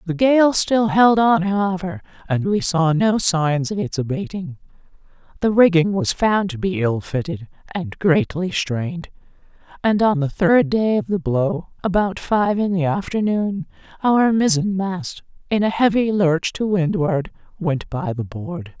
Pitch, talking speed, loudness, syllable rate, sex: 185 Hz, 165 wpm, -19 LUFS, 4.2 syllables/s, female